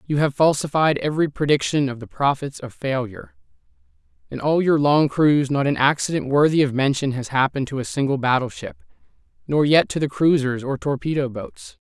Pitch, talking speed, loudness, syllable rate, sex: 140 Hz, 175 wpm, -20 LUFS, 5.7 syllables/s, male